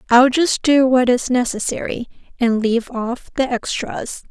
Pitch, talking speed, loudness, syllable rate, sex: 245 Hz, 155 wpm, -18 LUFS, 4.4 syllables/s, female